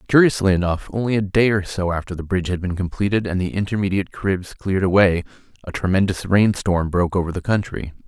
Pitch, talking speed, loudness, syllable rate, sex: 95 Hz, 200 wpm, -20 LUFS, 6.2 syllables/s, male